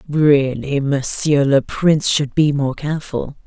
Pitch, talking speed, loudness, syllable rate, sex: 140 Hz, 140 wpm, -17 LUFS, 4.0 syllables/s, female